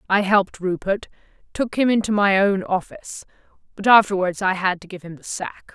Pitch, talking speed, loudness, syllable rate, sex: 195 Hz, 190 wpm, -20 LUFS, 5.4 syllables/s, female